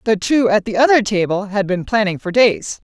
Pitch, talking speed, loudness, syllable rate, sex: 210 Hz, 225 wpm, -16 LUFS, 5.2 syllables/s, female